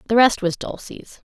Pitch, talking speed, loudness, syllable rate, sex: 215 Hz, 185 wpm, -20 LUFS, 4.9 syllables/s, female